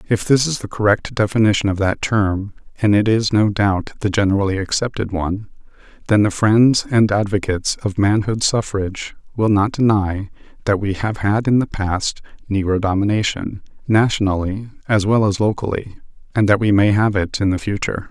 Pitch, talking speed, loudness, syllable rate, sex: 105 Hz, 165 wpm, -18 LUFS, 5.3 syllables/s, male